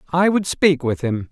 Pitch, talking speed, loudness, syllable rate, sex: 150 Hz, 230 wpm, -18 LUFS, 4.4 syllables/s, male